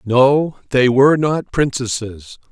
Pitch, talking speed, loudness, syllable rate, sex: 130 Hz, 120 wpm, -16 LUFS, 3.7 syllables/s, male